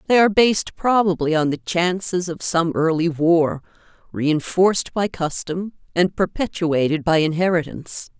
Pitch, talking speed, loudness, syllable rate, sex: 170 Hz, 130 wpm, -20 LUFS, 4.7 syllables/s, female